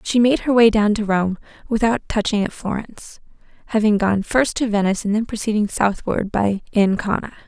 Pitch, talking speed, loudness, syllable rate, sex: 215 Hz, 170 wpm, -19 LUFS, 5.4 syllables/s, female